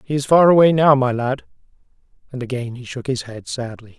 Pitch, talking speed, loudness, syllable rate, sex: 130 Hz, 210 wpm, -18 LUFS, 5.7 syllables/s, male